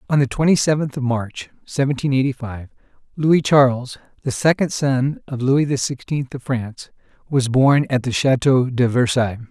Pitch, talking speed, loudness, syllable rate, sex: 130 Hz, 170 wpm, -19 LUFS, 4.9 syllables/s, male